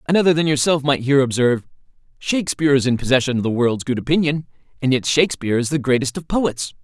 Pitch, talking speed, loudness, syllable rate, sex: 140 Hz, 200 wpm, -19 LUFS, 6.9 syllables/s, male